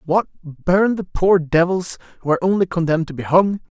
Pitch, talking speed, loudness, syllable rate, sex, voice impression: 175 Hz, 190 wpm, -18 LUFS, 5.5 syllables/s, male, masculine, slightly young, adult-like, slightly thick, tensed, slightly weak, slightly dark, hard, slightly clear, fluent, slightly cool, intellectual, slightly refreshing, sincere, very calm, slightly mature, slightly friendly, slightly reassuring, slightly elegant, slightly sweet, kind